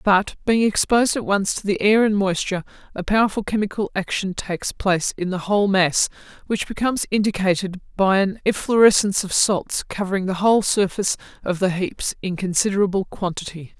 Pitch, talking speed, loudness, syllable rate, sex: 195 Hz, 165 wpm, -20 LUFS, 5.7 syllables/s, female